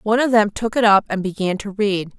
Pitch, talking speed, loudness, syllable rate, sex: 205 Hz, 275 wpm, -18 LUFS, 5.8 syllables/s, female